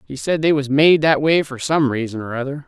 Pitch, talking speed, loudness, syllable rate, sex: 140 Hz, 270 wpm, -17 LUFS, 5.6 syllables/s, male